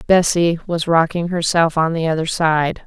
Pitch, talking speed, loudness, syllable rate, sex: 165 Hz, 170 wpm, -17 LUFS, 4.5 syllables/s, female